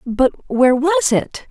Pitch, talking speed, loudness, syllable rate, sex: 280 Hz, 160 wpm, -16 LUFS, 3.6 syllables/s, female